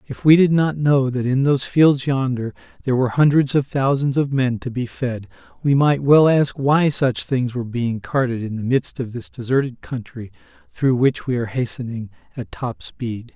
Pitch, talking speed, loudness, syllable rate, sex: 130 Hz, 200 wpm, -19 LUFS, 5.0 syllables/s, male